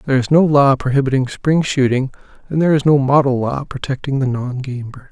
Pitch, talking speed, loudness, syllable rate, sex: 135 Hz, 210 wpm, -16 LUFS, 5.9 syllables/s, male